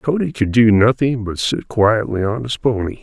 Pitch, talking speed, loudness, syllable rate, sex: 115 Hz, 200 wpm, -17 LUFS, 4.7 syllables/s, male